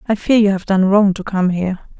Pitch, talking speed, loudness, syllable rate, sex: 195 Hz, 270 wpm, -15 LUFS, 5.9 syllables/s, female